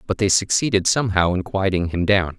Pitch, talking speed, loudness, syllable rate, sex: 95 Hz, 200 wpm, -19 LUFS, 5.8 syllables/s, male